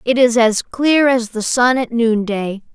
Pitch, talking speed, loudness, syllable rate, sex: 235 Hz, 195 wpm, -15 LUFS, 3.9 syllables/s, female